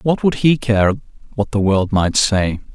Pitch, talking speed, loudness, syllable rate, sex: 110 Hz, 195 wpm, -16 LUFS, 4.3 syllables/s, male